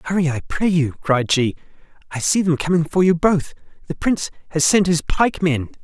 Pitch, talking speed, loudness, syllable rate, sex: 165 Hz, 195 wpm, -19 LUFS, 5.6 syllables/s, male